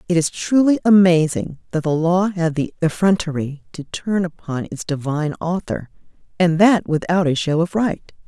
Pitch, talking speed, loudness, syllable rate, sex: 170 Hz, 165 wpm, -19 LUFS, 4.8 syllables/s, female